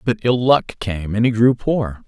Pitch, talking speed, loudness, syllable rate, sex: 115 Hz, 230 wpm, -18 LUFS, 4.2 syllables/s, male